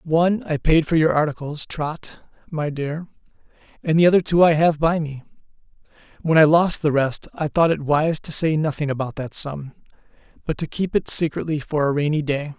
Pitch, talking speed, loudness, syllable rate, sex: 155 Hz, 195 wpm, -20 LUFS, 5.1 syllables/s, male